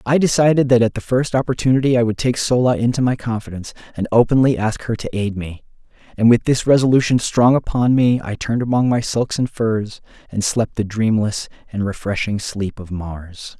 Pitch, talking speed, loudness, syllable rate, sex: 115 Hz, 195 wpm, -18 LUFS, 5.4 syllables/s, male